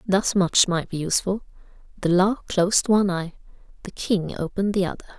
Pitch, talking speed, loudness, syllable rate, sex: 190 Hz, 160 wpm, -22 LUFS, 5.5 syllables/s, female